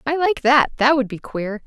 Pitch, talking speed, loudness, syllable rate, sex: 260 Hz, 250 wpm, -18 LUFS, 4.8 syllables/s, female